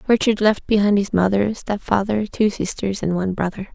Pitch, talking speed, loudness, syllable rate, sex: 200 Hz, 190 wpm, -20 LUFS, 5.4 syllables/s, female